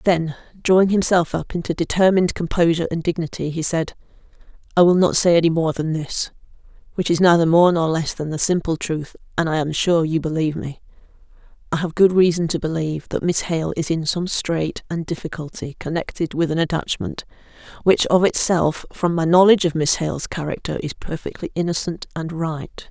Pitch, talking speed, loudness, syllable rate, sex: 165 Hz, 180 wpm, -20 LUFS, 5.5 syllables/s, female